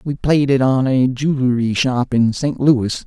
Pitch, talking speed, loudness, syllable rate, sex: 130 Hz, 195 wpm, -16 LUFS, 4.0 syllables/s, male